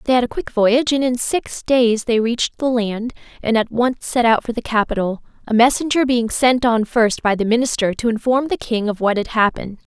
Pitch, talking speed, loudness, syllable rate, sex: 235 Hz, 230 wpm, -18 LUFS, 5.4 syllables/s, female